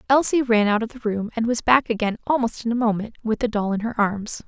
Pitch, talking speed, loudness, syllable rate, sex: 225 Hz, 270 wpm, -22 LUFS, 5.9 syllables/s, female